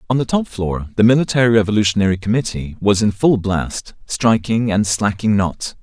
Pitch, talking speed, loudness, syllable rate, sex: 105 Hz, 165 wpm, -17 LUFS, 5.2 syllables/s, male